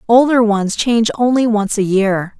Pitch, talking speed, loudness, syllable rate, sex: 220 Hz, 175 wpm, -14 LUFS, 4.6 syllables/s, female